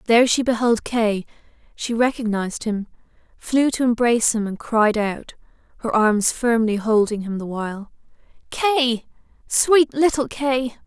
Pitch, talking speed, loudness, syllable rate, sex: 235 Hz, 140 wpm, -20 LUFS, 4.6 syllables/s, female